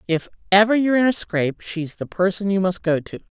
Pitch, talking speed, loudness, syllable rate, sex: 190 Hz, 230 wpm, -20 LUFS, 5.9 syllables/s, female